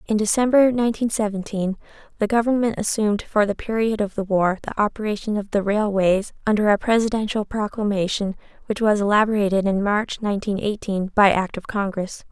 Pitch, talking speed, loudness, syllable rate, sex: 210 Hz, 160 wpm, -21 LUFS, 5.7 syllables/s, female